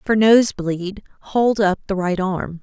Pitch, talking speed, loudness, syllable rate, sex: 195 Hz, 185 wpm, -18 LUFS, 3.6 syllables/s, female